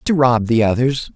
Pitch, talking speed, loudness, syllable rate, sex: 125 Hz, 210 wpm, -16 LUFS, 4.8 syllables/s, male